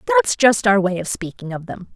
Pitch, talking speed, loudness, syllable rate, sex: 215 Hz, 245 wpm, -18 LUFS, 5.1 syllables/s, female